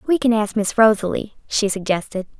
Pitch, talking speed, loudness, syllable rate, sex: 215 Hz, 175 wpm, -19 LUFS, 5.4 syllables/s, female